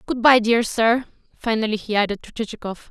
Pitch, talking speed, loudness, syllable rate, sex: 225 Hz, 185 wpm, -20 LUFS, 5.8 syllables/s, female